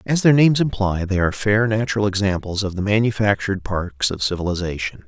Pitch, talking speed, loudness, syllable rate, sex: 100 Hz, 175 wpm, -20 LUFS, 6.1 syllables/s, male